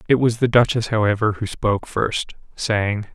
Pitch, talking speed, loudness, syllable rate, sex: 110 Hz, 170 wpm, -20 LUFS, 4.8 syllables/s, male